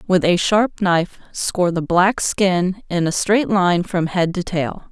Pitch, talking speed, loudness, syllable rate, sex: 180 Hz, 195 wpm, -18 LUFS, 4.0 syllables/s, female